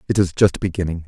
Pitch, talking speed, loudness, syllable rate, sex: 90 Hz, 225 wpm, -19 LUFS, 6.7 syllables/s, male